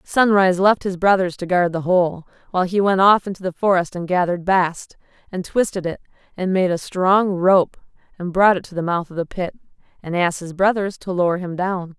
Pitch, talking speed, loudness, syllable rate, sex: 185 Hz, 215 wpm, -19 LUFS, 5.5 syllables/s, female